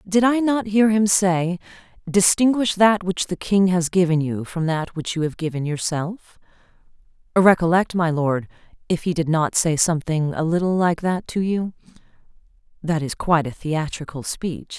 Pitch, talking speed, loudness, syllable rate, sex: 175 Hz, 160 wpm, -20 LUFS, 4.7 syllables/s, female